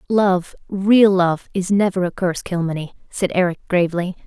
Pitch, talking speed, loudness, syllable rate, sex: 185 Hz, 125 wpm, -19 LUFS, 5.0 syllables/s, female